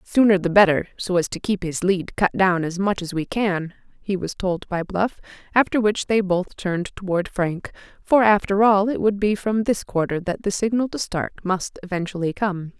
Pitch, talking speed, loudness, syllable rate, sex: 190 Hz, 215 wpm, -21 LUFS, 5.0 syllables/s, female